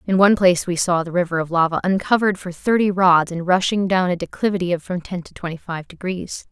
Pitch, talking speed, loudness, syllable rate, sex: 180 Hz, 230 wpm, -19 LUFS, 6.2 syllables/s, female